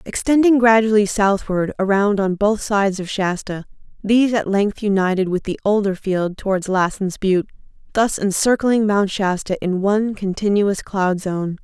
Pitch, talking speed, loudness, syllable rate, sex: 200 Hz, 150 wpm, -18 LUFS, 4.7 syllables/s, female